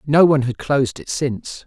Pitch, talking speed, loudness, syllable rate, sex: 140 Hz, 215 wpm, -18 LUFS, 5.8 syllables/s, male